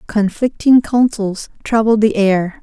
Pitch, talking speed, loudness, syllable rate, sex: 215 Hz, 115 wpm, -14 LUFS, 3.8 syllables/s, female